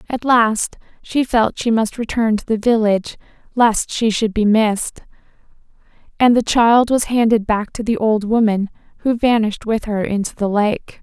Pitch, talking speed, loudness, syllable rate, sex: 220 Hz, 175 wpm, -17 LUFS, 4.7 syllables/s, female